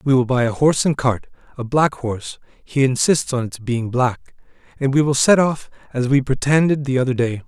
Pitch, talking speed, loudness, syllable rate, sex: 130 Hz, 215 wpm, -18 LUFS, 5.3 syllables/s, male